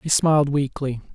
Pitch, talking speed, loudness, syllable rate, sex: 145 Hz, 155 wpm, -21 LUFS, 5.0 syllables/s, male